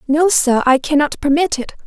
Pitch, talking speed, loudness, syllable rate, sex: 295 Hz, 195 wpm, -15 LUFS, 5.4 syllables/s, female